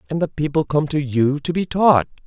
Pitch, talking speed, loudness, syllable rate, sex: 145 Hz, 240 wpm, -19 LUFS, 5.2 syllables/s, male